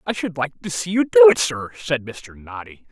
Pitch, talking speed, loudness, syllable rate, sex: 160 Hz, 245 wpm, -18 LUFS, 5.0 syllables/s, male